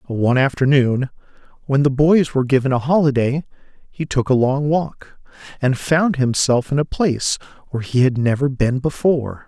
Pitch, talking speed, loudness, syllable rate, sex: 135 Hz, 170 wpm, -18 LUFS, 5.3 syllables/s, male